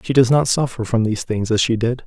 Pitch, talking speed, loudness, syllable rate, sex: 120 Hz, 290 wpm, -18 LUFS, 6.2 syllables/s, male